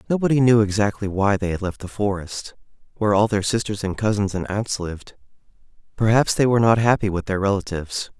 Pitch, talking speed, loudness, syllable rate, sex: 105 Hz, 190 wpm, -21 LUFS, 6.1 syllables/s, male